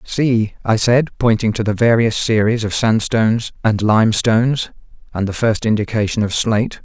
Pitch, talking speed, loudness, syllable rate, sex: 110 Hz, 160 wpm, -16 LUFS, 5.0 syllables/s, male